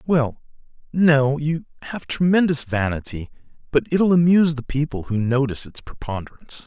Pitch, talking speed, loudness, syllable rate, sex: 140 Hz, 125 wpm, -20 LUFS, 5.2 syllables/s, male